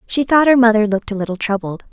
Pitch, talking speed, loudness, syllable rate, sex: 220 Hz, 250 wpm, -15 LUFS, 7.0 syllables/s, female